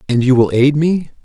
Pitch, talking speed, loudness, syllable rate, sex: 135 Hz, 240 wpm, -13 LUFS, 5.4 syllables/s, male